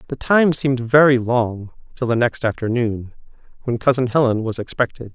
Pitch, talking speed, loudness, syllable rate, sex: 120 Hz, 165 wpm, -18 LUFS, 5.2 syllables/s, male